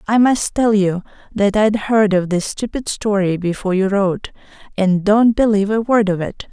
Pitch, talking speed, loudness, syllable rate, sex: 205 Hz, 195 wpm, -16 LUFS, 5.0 syllables/s, female